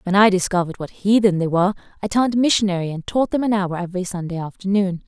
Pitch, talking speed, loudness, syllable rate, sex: 195 Hz, 215 wpm, -20 LUFS, 6.9 syllables/s, female